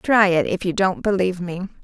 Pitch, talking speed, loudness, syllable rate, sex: 190 Hz, 230 wpm, -20 LUFS, 5.6 syllables/s, female